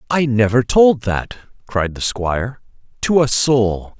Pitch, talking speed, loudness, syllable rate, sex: 120 Hz, 150 wpm, -16 LUFS, 3.8 syllables/s, male